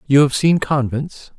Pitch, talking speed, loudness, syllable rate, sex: 140 Hz, 175 wpm, -17 LUFS, 4.0 syllables/s, male